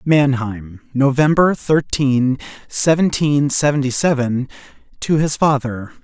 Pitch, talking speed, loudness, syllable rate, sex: 140 Hz, 90 wpm, -17 LUFS, 3.8 syllables/s, male